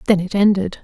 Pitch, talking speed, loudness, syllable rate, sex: 195 Hz, 215 wpm, -16 LUFS, 6.0 syllables/s, female